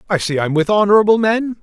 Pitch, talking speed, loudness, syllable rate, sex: 195 Hz, 220 wpm, -15 LUFS, 6.3 syllables/s, male